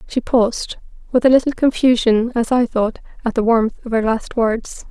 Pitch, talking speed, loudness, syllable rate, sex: 235 Hz, 195 wpm, -17 LUFS, 4.9 syllables/s, female